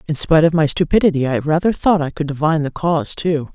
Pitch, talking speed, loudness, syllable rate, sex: 155 Hz, 235 wpm, -17 LUFS, 6.5 syllables/s, female